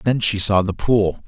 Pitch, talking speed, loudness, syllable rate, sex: 105 Hz, 235 wpm, -18 LUFS, 4.6 syllables/s, male